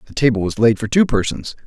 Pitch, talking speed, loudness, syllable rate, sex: 115 Hz, 250 wpm, -17 LUFS, 6.4 syllables/s, male